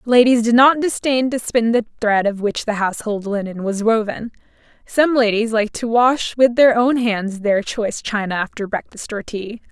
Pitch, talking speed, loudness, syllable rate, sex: 225 Hz, 190 wpm, -18 LUFS, 4.9 syllables/s, female